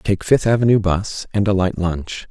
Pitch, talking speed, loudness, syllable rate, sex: 100 Hz, 210 wpm, -18 LUFS, 4.5 syllables/s, male